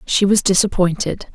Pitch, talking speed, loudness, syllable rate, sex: 190 Hz, 135 wpm, -16 LUFS, 4.9 syllables/s, female